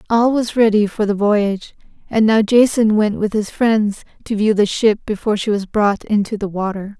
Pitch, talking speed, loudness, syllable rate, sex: 210 Hz, 205 wpm, -16 LUFS, 5.1 syllables/s, female